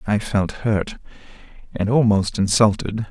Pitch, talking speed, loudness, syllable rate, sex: 105 Hz, 115 wpm, -19 LUFS, 4.1 syllables/s, male